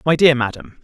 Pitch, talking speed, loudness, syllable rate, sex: 140 Hz, 215 wpm, -16 LUFS, 5.7 syllables/s, male